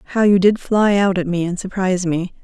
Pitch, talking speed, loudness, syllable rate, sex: 190 Hz, 245 wpm, -17 LUFS, 5.8 syllables/s, female